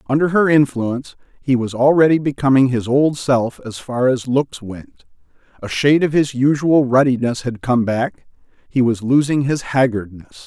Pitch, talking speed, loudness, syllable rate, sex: 130 Hz, 165 wpm, -17 LUFS, 4.8 syllables/s, male